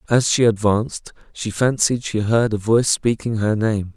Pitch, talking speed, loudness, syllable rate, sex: 110 Hz, 180 wpm, -19 LUFS, 4.8 syllables/s, male